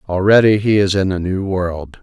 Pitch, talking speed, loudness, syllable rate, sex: 95 Hz, 205 wpm, -15 LUFS, 5.0 syllables/s, male